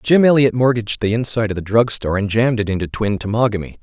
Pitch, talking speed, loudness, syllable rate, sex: 110 Hz, 235 wpm, -17 LUFS, 6.9 syllables/s, male